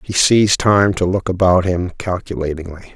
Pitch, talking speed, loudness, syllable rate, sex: 90 Hz, 165 wpm, -16 LUFS, 5.0 syllables/s, male